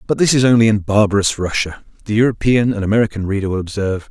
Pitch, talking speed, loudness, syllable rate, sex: 105 Hz, 205 wpm, -16 LUFS, 7.0 syllables/s, male